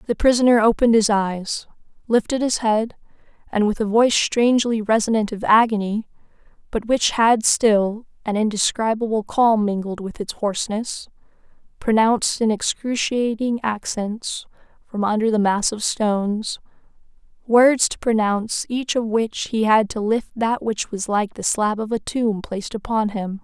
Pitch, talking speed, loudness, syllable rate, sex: 220 Hz, 150 wpm, -20 LUFS, 4.6 syllables/s, female